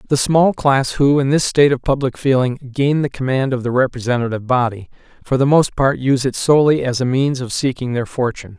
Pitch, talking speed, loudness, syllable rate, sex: 130 Hz, 215 wpm, -17 LUFS, 5.9 syllables/s, male